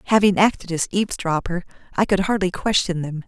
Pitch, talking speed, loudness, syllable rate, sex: 185 Hz, 165 wpm, -21 LUFS, 6.0 syllables/s, female